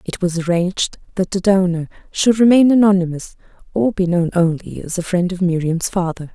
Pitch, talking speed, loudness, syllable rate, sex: 180 Hz, 180 wpm, -17 LUFS, 5.3 syllables/s, female